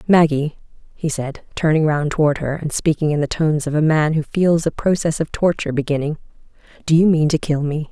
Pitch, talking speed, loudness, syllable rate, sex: 155 Hz, 210 wpm, -18 LUFS, 5.7 syllables/s, female